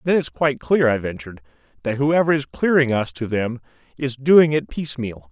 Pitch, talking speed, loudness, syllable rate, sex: 130 Hz, 190 wpm, -20 LUFS, 5.5 syllables/s, male